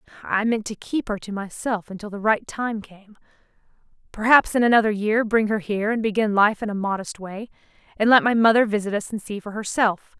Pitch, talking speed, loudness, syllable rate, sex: 215 Hz, 210 wpm, -21 LUFS, 5.7 syllables/s, female